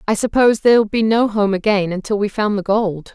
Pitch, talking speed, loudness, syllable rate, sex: 210 Hz, 230 wpm, -16 LUFS, 5.7 syllables/s, female